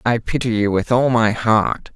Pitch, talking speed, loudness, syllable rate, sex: 115 Hz, 215 wpm, -18 LUFS, 4.3 syllables/s, male